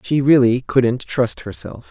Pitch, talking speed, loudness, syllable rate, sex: 125 Hz, 160 wpm, -17 LUFS, 3.9 syllables/s, male